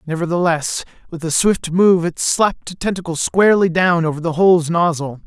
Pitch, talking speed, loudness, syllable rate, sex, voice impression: 170 Hz, 170 wpm, -16 LUFS, 5.2 syllables/s, male, masculine, adult-like, slightly refreshing, sincere, slightly lively